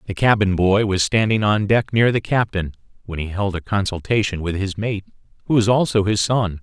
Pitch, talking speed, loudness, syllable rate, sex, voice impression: 100 Hz, 210 wpm, -19 LUFS, 5.2 syllables/s, male, masculine, adult-like, slightly thick, slightly intellectual, sincere, calm